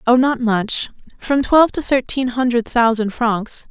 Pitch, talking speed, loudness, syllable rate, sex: 240 Hz, 145 wpm, -17 LUFS, 4.2 syllables/s, female